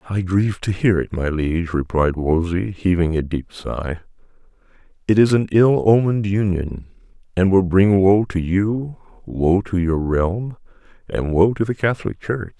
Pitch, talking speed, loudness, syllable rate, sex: 95 Hz, 165 wpm, -19 LUFS, 4.5 syllables/s, male